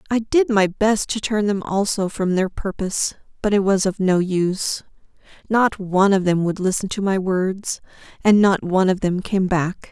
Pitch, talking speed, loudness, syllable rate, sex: 195 Hz, 200 wpm, -20 LUFS, 4.8 syllables/s, female